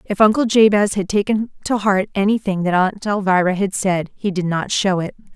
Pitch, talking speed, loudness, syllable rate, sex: 200 Hz, 200 wpm, -18 LUFS, 5.2 syllables/s, female